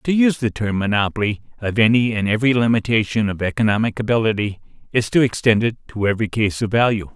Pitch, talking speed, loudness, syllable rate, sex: 110 Hz, 185 wpm, -19 LUFS, 6.5 syllables/s, male